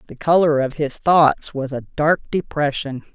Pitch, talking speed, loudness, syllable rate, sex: 150 Hz, 170 wpm, -19 LUFS, 4.4 syllables/s, female